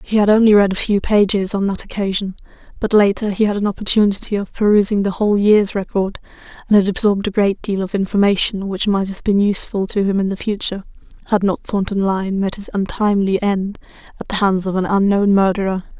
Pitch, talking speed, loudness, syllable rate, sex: 200 Hz, 205 wpm, -17 LUFS, 6.1 syllables/s, female